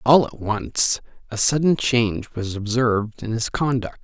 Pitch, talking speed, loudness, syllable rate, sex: 115 Hz, 165 wpm, -21 LUFS, 4.4 syllables/s, male